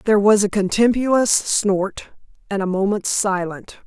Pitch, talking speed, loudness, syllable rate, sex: 205 Hz, 140 wpm, -18 LUFS, 4.6 syllables/s, female